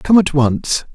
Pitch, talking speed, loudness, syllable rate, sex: 155 Hz, 190 wpm, -15 LUFS, 3.6 syllables/s, male